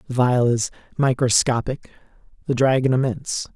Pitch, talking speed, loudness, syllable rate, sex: 125 Hz, 120 wpm, -20 LUFS, 5.1 syllables/s, male